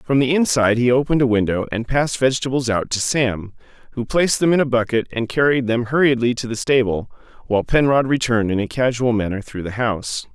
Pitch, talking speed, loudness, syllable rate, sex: 120 Hz, 210 wpm, -19 LUFS, 6.3 syllables/s, male